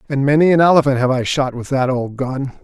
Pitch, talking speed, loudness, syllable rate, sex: 135 Hz, 250 wpm, -16 LUFS, 5.9 syllables/s, male